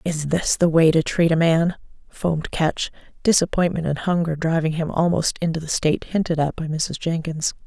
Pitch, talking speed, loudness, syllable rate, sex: 165 Hz, 190 wpm, -21 LUFS, 5.1 syllables/s, female